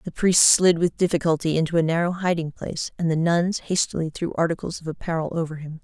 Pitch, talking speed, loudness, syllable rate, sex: 165 Hz, 205 wpm, -22 LUFS, 6.0 syllables/s, female